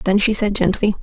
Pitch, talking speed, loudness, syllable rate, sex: 200 Hz, 235 wpm, -17 LUFS, 5.9 syllables/s, female